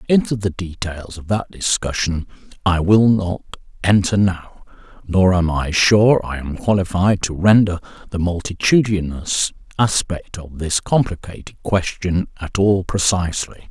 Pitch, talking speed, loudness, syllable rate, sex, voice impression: 95 Hz, 130 wpm, -18 LUFS, 4.2 syllables/s, male, masculine, very adult-like, slightly thick, slightly intellectual, slightly wild